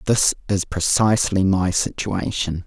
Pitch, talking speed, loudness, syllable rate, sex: 95 Hz, 110 wpm, -20 LUFS, 4.2 syllables/s, male